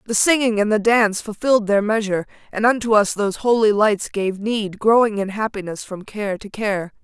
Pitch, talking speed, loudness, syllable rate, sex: 210 Hz, 195 wpm, -19 LUFS, 5.3 syllables/s, female